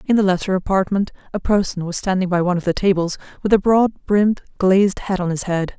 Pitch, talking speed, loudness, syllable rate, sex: 190 Hz, 230 wpm, -19 LUFS, 6.2 syllables/s, female